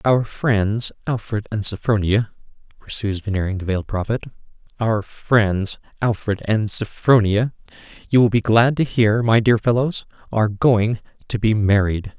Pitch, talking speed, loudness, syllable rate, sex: 110 Hz, 145 wpm, -19 LUFS, 4.5 syllables/s, male